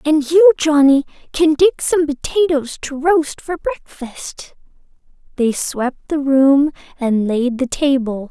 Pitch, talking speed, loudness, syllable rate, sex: 290 Hz, 135 wpm, -16 LUFS, 3.6 syllables/s, female